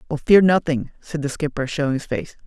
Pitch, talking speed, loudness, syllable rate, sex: 145 Hz, 220 wpm, -20 LUFS, 5.7 syllables/s, male